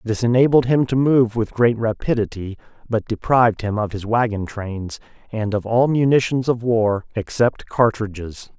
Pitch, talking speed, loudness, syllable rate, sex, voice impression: 115 Hz, 160 wpm, -19 LUFS, 4.7 syllables/s, male, very masculine, very adult-like, middle-aged, very thick, tensed, powerful, slightly bright, slightly soft, clear, very fluent, very cool, very intellectual, refreshing, very sincere, very calm, very mature, friendly, reassuring, unique, slightly elegant, wild, slightly sweet, slightly lively, kind, slightly modest